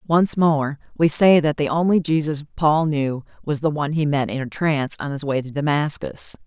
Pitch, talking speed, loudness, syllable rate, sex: 150 Hz, 215 wpm, -20 LUFS, 5.1 syllables/s, female